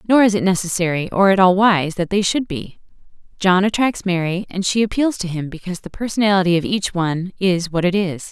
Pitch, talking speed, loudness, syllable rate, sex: 190 Hz, 215 wpm, -18 LUFS, 5.8 syllables/s, female